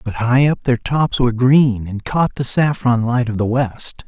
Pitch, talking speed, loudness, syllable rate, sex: 125 Hz, 220 wpm, -16 LUFS, 4.4 syllables/s, male